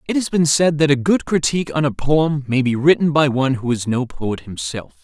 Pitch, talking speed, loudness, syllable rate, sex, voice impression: 140 Hz, 250 wpm, -18 LUFS, 5.4 syllables/s, male, masculine, adult-like, slightly clear, slightly refreshing, friendly